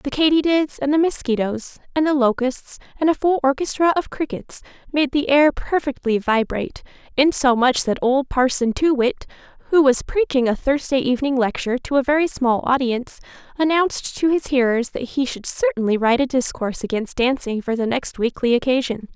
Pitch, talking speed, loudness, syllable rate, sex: 265 Hz, 175 wpm, -19 LUFS, 5.4 syllables/s, female